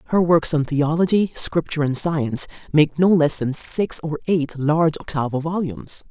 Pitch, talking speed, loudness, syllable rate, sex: 155 Hz, 165 wpm, -19 LUFS, 5.2 syllables/s, female